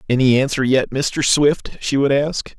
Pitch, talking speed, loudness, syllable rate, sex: 135 Hz, 185 wpm, -17 LUFS, 4.3 syllables/s, male